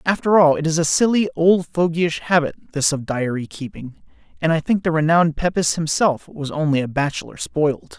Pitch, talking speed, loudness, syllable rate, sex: 160 Hz, 190 wpm, -19 LUFS, 5.4 syllables/s, male